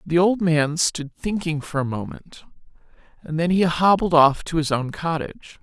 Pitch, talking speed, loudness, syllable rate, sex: 165 Hz, 180 wpm, -21 LUFS, 4.7 syllables/s, female